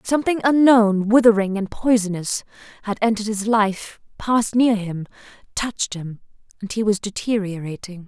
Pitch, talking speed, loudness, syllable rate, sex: 210 Hz, 135 wpm, -20 LUFS, 5.1 syllables/s, female